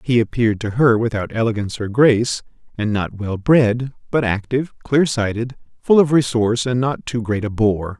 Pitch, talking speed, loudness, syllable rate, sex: 115 Hz, 190 wpm, -18 LUFS, 5.2 syllables/s, male